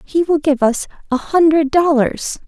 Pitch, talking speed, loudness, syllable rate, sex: 295 Hz, 145 wpm, -15 LUFS, 4.3 syllables/s, female